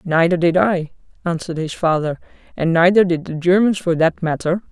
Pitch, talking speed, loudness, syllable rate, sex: 170 Hz, 180 wpm, -18 LUFS, 5.4 syllables/s, female